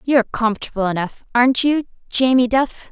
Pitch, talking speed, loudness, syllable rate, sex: 245 Hz, 145 wpm, -18 LUFS, 5.6 syllables/s, female